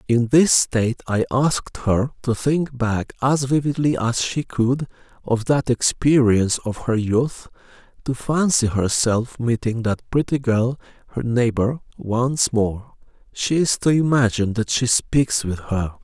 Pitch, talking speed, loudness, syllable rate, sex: 120 Hz, 150 wpm, -20 LUFS, 4.1 syllables/s, male